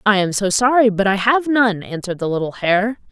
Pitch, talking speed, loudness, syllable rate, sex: 210 Hz, 230 wpm, -17 LUFS, 5.5 syllables/s, female